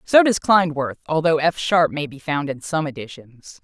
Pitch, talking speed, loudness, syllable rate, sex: 155 Hz, 200 wpm, -20 LUFS, 4.7 syllables/s, female